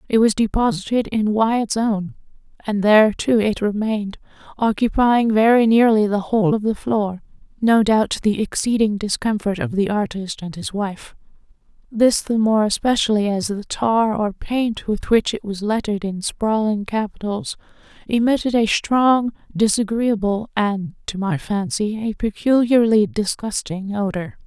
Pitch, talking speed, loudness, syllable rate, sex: 215 Hz, 140 wpm, -19 LUFS, 4.5 syllables/s, female